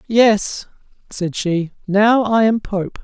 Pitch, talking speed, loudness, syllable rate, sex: 205 Hz, 140 wpm, -17 LUFS, 3.0 syllables/s, male